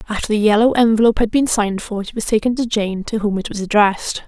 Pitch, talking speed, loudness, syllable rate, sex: 215 Hz, 255 wpm, -17 LUFS, 6.7 syllables/s, female